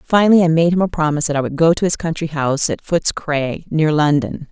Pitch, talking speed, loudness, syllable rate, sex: 155 Hz, 255 wpm, -16 LUFS, 6.0 syllables/s, female